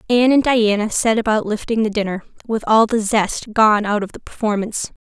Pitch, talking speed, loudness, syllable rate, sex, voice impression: 215 Hz, 205 wpm, -17 LUFS, 5.5 syllables/s, female, feminine, young, tensed, bright, slightly soft, clear, fluent, slightly intellectual, friendly, lively, slightly kind